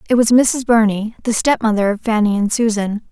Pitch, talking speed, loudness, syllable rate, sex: 220 Hz, 195 wpm, -16 LUFS, 5.4 syllables/s, female